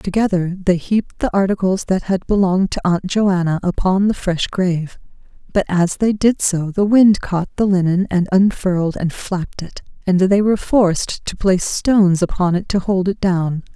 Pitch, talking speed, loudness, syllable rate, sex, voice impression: 185 Hz, 190 wpm, -17 LUFS, 4.9 syllables/s, female, feminine, gender-neutral, slightly young, slightly adult-like, slightly thin, relaxed, slightly weak, slightly dark, very soft, slightly muffled, very fluent, very cute, intellectual, slightly refreshing, sincere, very calm, very friendly, very reassuring, slightly unique, very elegant, very sweet, slightly lively, very kind, slightly modest, light